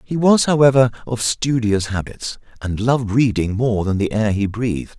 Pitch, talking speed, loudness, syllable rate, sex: 115 Hz, 180 wpm, -18 LUFS, 4.9 syllables/s, male